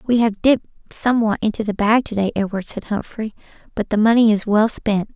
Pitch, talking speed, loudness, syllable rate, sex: 215 Hz, 210 wpm, -19 LUFS, 5.5 syllables/s, female